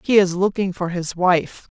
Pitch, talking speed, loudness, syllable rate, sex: 185 Hz, 205 wpm, -20 LUFS, 4.4 syllables/s, female